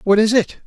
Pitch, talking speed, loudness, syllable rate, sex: 220 Hz, 270 wpm, -16 LUFS, 5.6 syllables/s, male